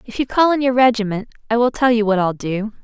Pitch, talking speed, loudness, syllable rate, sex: 230 Hz, 275 wpm, -17 LUFS, 6.2 syllables/s, female